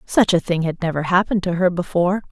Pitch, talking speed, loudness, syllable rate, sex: 180 Hz, 235 wpm, -19 LUFS, 6.5 syllables/s, female